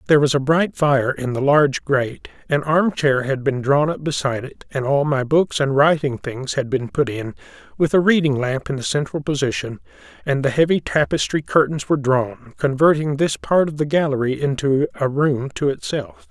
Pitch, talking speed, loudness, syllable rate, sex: 140 Hz, 200 wpm, -19 LUFS, 5.2 syllables/s, male